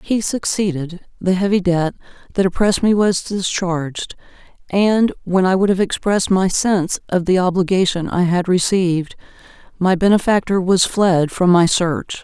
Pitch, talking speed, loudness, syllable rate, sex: 185 Hz, 150 wpm, -17 LUFS, 4.8 syllables/s, female